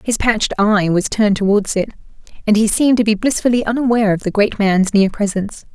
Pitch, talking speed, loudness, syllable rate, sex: 210 Hz, 210 wpm, -15 LUFS, 6.3 syllables/s, female